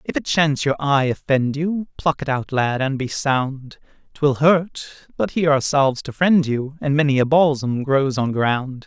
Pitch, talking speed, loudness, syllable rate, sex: 140 Hz, 205 wpm, -19 LUFS, 4.7 syllables/s, male